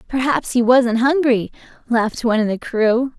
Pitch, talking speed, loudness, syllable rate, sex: 240 Hz, 170 wpm, -17 LUFS, 5.0 syllables/s, female